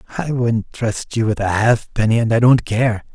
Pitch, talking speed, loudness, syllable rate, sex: 115 Hz, 210 wpm, -17 LUFS, 4.8 syllables/s, male